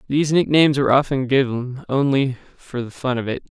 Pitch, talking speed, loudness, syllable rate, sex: 135 Hz, 185 wpm, -19 LUFS, 5.5 syllables/s, male